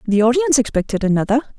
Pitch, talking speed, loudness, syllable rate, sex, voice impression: 240 Hz, 150 wpm, -17 LUFS, 7.7 syllables/s, female, feminine, adult-like, relaxed, slightly bright, soft, raspy, intellectual, calm, reassuring, elegant, kind, modest